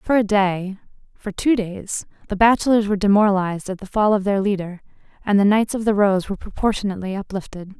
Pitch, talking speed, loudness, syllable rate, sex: 200 Hz, 175 wpm, -20 LUFS, 6.2 syllables/s, female